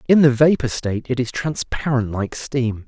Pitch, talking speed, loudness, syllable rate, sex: 130 Hz, 190 wpm, -20 LUFS, 4.8 syllables/s, male